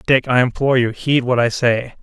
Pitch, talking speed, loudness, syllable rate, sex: 125 Hz, 235 wpm, -16 LUFS, 5.4 syllables/s, male